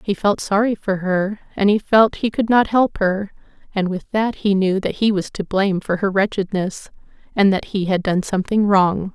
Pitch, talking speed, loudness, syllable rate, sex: 200 Hz, 215 wpm, -19 LUFS, 4.9 syllables/s, female